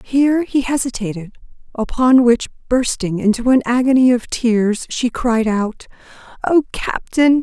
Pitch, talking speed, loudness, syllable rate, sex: 245 Hz, 130 wpm, -16 LUFS, 4.3 syllables/s, female